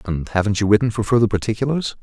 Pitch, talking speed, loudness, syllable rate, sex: 110 Hz, 205 wpm, -19 LUFS, 6.8 syllables/s, male